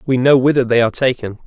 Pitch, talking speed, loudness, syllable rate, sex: 125 Hz, 245 wpm, -14 LUFS, 6.9 syllables/s, male